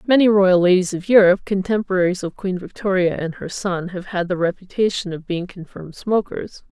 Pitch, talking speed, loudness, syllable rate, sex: 185 Hz, 180 wpm, -19 LUFS, 5.6 syllables/s, female